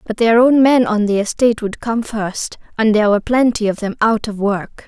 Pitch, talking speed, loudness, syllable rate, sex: 220 Hz, 235 wpm, -16 LUFS, 5.3 syllables/s, female